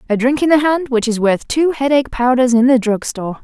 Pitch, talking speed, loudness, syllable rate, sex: 255 Hz, 245 wpm, -15 LUFS, 5.9 syllables/s, female